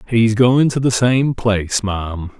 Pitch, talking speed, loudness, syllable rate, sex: 110 Hz, 175 wpm, -16 LUFS, 4.1 syllables/s, male